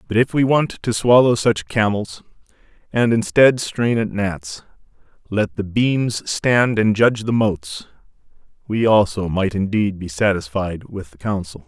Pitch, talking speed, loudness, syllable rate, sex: 105 Hz, 155 wpm, -18 LUFS, 4.3 syllables/s, male